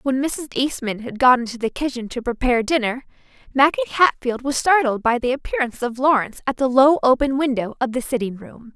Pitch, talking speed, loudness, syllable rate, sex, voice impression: 260 Hz, 200 wpm, -20 LUFS, 5.6 syllables/s, female, very feminine, very young, very thin, very tensed, powerful, very bright, hard, very clear, very fluent, slightly raspy, very cute, intellectual, very refreshing, sincere, very friendly, very reassuring, unique, elegant, slightly wild, sweet, very lively, slightly strict, intense, slightly sharp, light